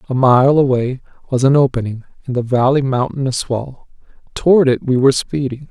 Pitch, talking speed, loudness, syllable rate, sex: 130 Hz, 170 wpm, -15 LUFS, 5.5 syllables/s, male